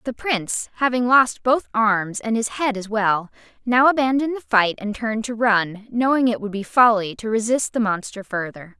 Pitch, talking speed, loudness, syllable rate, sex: 225 Hz, 200 wpm, -20 LUFS, 5.0 syllables/s, female